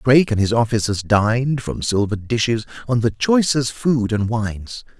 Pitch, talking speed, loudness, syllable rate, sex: 115 Hz, 170 wpm, -19 LUFS, 4.9 syllables/s, male